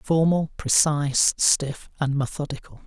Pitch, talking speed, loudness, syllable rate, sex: 145 Hz, 105 wpm, -22 LUFS, 4.2 syllables/s, male